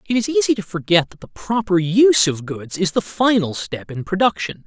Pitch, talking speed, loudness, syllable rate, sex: 190 Hz, 220 wpm, -18 LUFS, 5.3 syllables/s, male